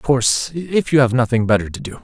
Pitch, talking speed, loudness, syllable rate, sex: 125 Hz, 265 wpm, -17 LUFS, 6.1 syllables/s, male